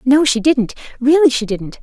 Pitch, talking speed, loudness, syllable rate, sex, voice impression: 260 Hz, 165 wpm, -15 LUFS, 4.8 syllables/s, female, feminine, slightly young, tensed, powerful, clear, fluent, intellectual, calm, lively, sharp